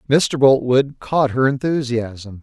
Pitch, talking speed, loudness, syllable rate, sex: 130 Hz, 125 wpm, -17 LUFS, 3.6 syllables/s, male